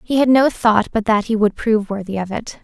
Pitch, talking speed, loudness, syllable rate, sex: 220 Hz, 275 wpm, -17 LUFS, 5.6 syllables/s, female